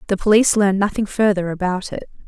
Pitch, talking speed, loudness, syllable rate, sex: 195 Hz, 185 wpm, -18 LUFS, 6.8 syllables/s, female